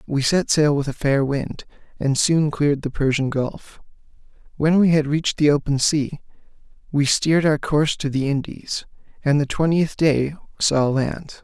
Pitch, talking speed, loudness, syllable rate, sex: 145 Hz, 175 wpm, -20 LUFS, 4.6 syllables/s, male